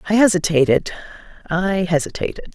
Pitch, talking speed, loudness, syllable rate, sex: 175 Hz, 95 wpm, -18 LUFS, 5.7 syllables/s, female